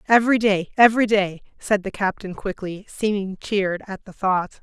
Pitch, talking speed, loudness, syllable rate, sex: 200 Hz, 170 wpm, -21 LUFS, 5.3 syllables/s, female